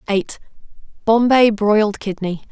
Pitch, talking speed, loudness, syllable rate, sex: 210 Hz, 70 wpm, -17 LUFS, 4.3 syllables/s, female